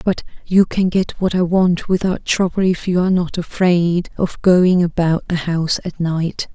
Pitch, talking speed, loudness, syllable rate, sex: 175 Hz, 195 wpm, -17 LUFS, 4.5 syllables/s, female